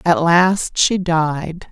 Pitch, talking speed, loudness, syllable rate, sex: 170 Hz, 140 wpm, -16 LUFS, 2.5 syllables/s, female